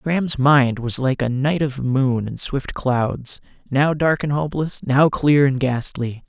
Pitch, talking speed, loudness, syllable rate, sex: 135 Hz, 180 wpm, -19 LUFS, 3.9 syllables/s, male